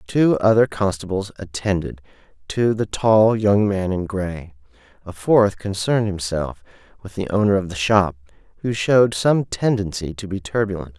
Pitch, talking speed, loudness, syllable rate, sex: 100 Hz, 155 wpm, -20 LUFS, 4.7 syllables/s, male